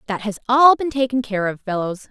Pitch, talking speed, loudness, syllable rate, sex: 230 Hz, 230 wpm, -18 LUFS, 5.5 syllables/s, female